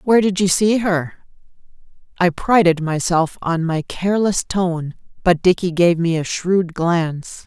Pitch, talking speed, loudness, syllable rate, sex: 175 Hz, 155 wpm, -18 LUFS, 4.2 syllables/s, female